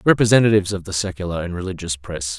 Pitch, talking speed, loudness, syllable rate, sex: 90 Hz, 175 wpm, -20 LUFS, 7.0 syllables/s, male